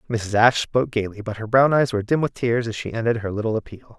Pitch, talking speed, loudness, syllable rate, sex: 115 Hz, 270 wpm, -21 LUFS, 6.6 syllables/s, male